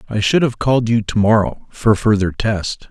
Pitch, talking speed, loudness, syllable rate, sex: 110 Hz, 205 wpm, -16 LUFS, 5.0 syllables/s, male